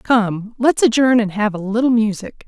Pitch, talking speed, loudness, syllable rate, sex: 225 Hz, 195 wpm, -16 LUFS, 4.6 syllables/s, female